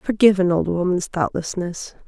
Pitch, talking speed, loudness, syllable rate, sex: 185 Hz, 145 wpm, -20 LUFS, 5.2 syllables/s, female